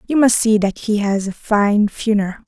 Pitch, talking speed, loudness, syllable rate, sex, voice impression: 215 Hz, 220 wpm, -17 LUFS, 5.1 syllables/s, female, feminine, adult-like, relaxed, muffled, calm, friendly, reassuring, kind, modest